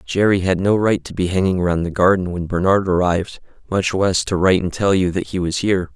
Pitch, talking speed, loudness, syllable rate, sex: 95 Hz, 240 wpm, -18 LUFS, 5.8 syllables/s, male